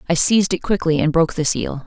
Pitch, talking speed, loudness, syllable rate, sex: 170 Hz, 260 wpm, -18 LUFS, 6.5 syllables/s, female